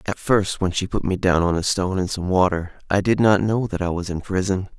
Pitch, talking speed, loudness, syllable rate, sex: 95 Hz, 275 wpm, -21 LUFS, 5.6 syllables/s, male